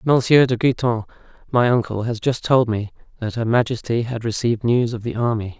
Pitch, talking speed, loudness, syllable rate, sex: 115 Hz, 195 wpm, -20 LUFS, 5.5 syllables/s, male